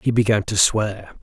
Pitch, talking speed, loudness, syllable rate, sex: 105 Hz, 195 wpm, -19 LUFS, 4.6 syllables/s, male